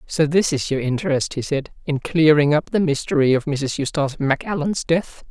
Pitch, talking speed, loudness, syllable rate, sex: 150 Hz, 190 wpm, -20 LUFS, 5.2 syllables/s, female